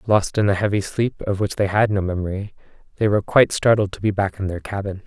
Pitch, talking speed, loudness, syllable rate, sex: 100 Hz, 250 wpm, -20 LUFS, 6.3 syllables/s, male